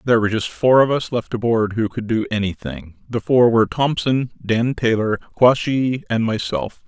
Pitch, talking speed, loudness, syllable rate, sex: 115 Hz, 185 wpm, -19 LUFS, 4.9 syllables/s, male